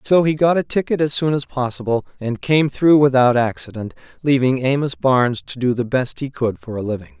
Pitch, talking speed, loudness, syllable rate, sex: 130 Hz, 215 wpm, -18 LUFS, 5.5 syllables/s, male